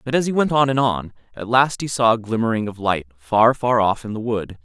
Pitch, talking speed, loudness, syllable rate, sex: 115 Hz, 270 wpm, -19 LUFS, 5.5 syllables/s, male